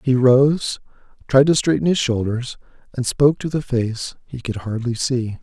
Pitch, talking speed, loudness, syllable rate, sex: 125 Hz, 175 wpm, -19 LUFS, 4.6 syllables/s, male